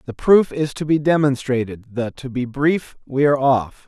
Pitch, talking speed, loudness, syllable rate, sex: 135 Hz, 185 wpm, -19 LUFS, 4.7 syllables/s, male